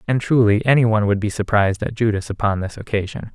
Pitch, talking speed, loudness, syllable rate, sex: 110 Hz, 215 wpm, -19 LUFS, 6.6 syllables/s, male